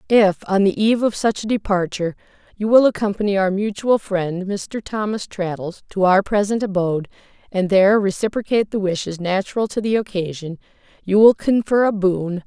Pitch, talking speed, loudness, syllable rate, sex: 200 Hz, 170 wpm, -19 LUFS, 5.4 syllables/s, female